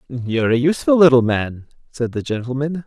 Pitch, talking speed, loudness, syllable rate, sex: 130 Hz, 170 wpm, -17 LUFS, 5.7 syllables/s, male